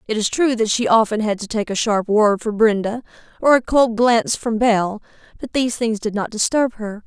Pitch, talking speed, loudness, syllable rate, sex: 220 Hz, 230 wpm, -18 LUFS, 5.4 syllables/s, female